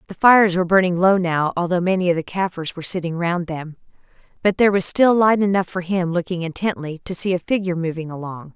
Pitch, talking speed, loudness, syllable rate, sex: 180 Hz, 220 wpm, -19 LUFS, 6.3 syllables/s, female